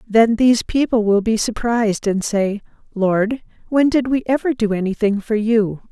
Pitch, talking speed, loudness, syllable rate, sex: 220 Hz, 175 wpm, -18 LUFS, 4.7 syllables/s, female